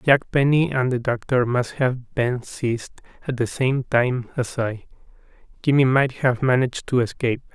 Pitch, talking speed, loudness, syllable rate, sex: 125 Hz, 165 wpm, -22 LUFS, 4.7 syllables/s, male